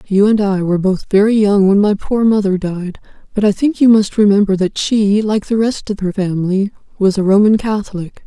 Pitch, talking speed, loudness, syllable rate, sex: 205 Hz, 220 wpm, -14 LUFS, 5.3 syllables/s, female